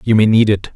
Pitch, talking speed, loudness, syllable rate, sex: 105 Hz, 315 wpm, -13 LUFS, 6.2 syllables/s, male